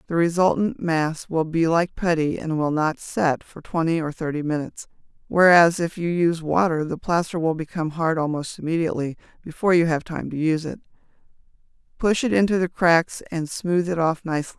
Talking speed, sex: 200 wpm, female